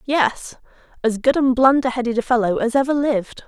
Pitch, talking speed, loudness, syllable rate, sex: 255 Hz, 190 wpm, -18 LUFS, 5.5 syllables/s, female